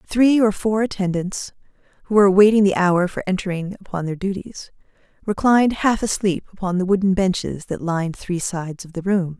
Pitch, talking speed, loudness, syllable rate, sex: 190 Hz, 180 wpm, -20 LUFS, 5.6 syllables/s, female